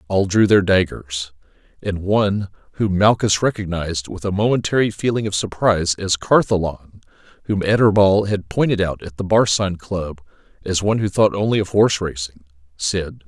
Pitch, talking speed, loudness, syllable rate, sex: 95 Hz, 160 wpm, -19 LUFS, 5.3 syllables/s, male